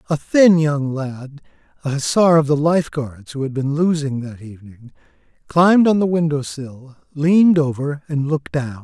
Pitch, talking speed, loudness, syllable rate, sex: 145 Hz, 175 wpm, -17 LUFS, 4.7 syllables/s, male